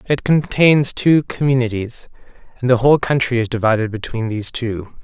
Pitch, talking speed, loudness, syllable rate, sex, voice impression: 125 Hz, 155 wpm, -17 LUFS, 5.3 syllables/s, male, masculine, adult-like, slightly tensed, slightly weak, soft, intellectual, slightly refreshing, calm, friendly, reassuring, kind, modest